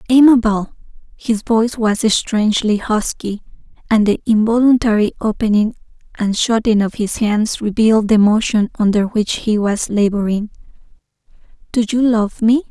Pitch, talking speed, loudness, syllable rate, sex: 220 Hz, 130 wpm, -15 LUFS, 4.9 syllables/s, female